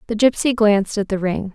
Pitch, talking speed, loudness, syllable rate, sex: 215 Hz, 235 wpm, -18 LUFS, 5.8 syllables/s, female